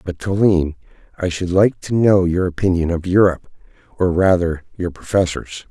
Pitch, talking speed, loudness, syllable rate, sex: 90 Hz, 160 wpm, -18 LUFS, 5.3 syllables/s, male